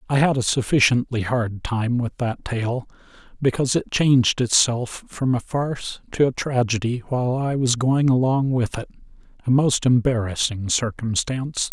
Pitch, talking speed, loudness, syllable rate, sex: 125 Hz, 150 wpm, -21 LUFS, 4.6 syllables/s, male